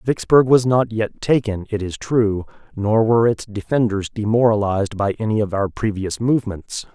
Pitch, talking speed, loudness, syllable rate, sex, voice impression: 110 Hz, 165 wpm, -19 LUFS, 5.0 syllables/s, male, masculine, adult-like, slightly fluent, slightly refreshing, sincere